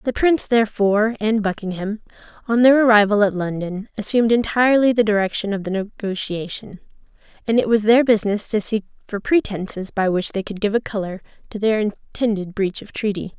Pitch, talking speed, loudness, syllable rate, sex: 210 Hz, 175 wpm, -19 LUFS, 5.7 syllables/s, female